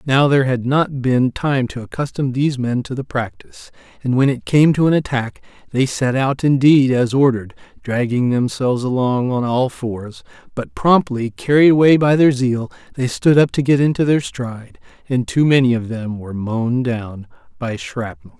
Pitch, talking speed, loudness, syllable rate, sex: 130 Hz, 185 wpm, -17 LUFS, 4.9 syllables/s, male